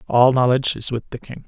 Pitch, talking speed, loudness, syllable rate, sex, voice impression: 125 Hz, 245 wpm, -18 LUFS, 6.1 syllables/s, male, very masculine, slightly old, relaxed, weak, dark, very soft, muffled, fluent, cool, intellectual, sincere, very calm, very mature, very friendly, reassuring, unique, elegant, slightly wild, sweet, slightly lively, kind, slightly modest